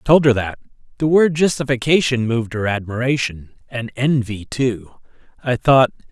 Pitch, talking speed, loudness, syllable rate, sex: 125 Hz, 125 wpm, -18 LUFS, 4.7 syllables/s, male